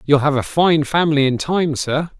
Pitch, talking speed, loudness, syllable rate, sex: 150 Hz, 220 wpm, -17 LUFS, 5.0 syllables/s, male